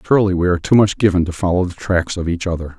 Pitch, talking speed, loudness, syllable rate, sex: 90 Hz, 280 wpm, -17 LUFS, 7.2 syllables/s, male